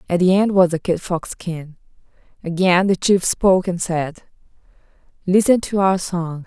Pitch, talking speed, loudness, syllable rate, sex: 180 Hz, 165 wpm, -18 LUFS, 4.7 syllables/s, female